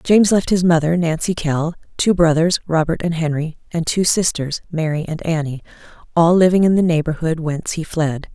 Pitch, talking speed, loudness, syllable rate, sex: 165 Hz, 180 wpm, -18 LUFS, 5.3 syllables/s, female